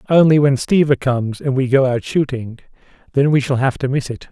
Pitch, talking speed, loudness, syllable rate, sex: 135 Hz, 225 wpm, -16 LUFS, 5.6 syllables/s, male